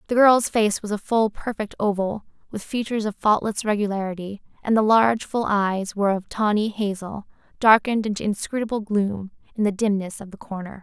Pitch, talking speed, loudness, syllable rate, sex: 210 Hz, 175 wpm, -22 LUFS, 5.5 syllables/s, female